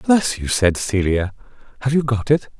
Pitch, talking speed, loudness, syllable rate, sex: 120 Hz, 185 wpm, -19 LUFS, 4.5 syllables/s, male